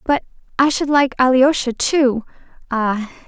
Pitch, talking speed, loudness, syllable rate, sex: 260 Hz, 130 wpm, -17 LUFS, 4.1 syllables/s, female